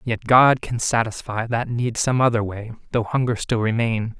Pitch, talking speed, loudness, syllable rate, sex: 115 Hz, 185 wpm, -21 LUFS, 4.7 syllables/s, male